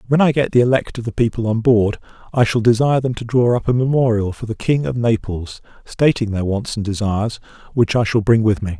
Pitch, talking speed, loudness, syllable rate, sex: 115 Hz, 240 wpm, -18 LUFS, 5.8 syllables/s, male